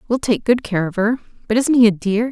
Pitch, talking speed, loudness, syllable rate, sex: 225 Hz, 285 wpm, -17 LUFS, 5.9 syllables/s, female